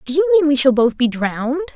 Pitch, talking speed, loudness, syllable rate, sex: 285 Hz, 275 wpm, -16 LUFS, 5.8 syllables/s, female